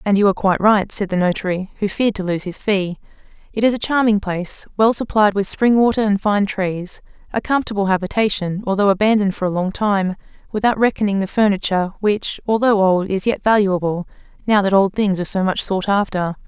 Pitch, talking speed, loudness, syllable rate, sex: 200 Hz, 200 wpm, -18 LUFS, 5.9 syllables/s, female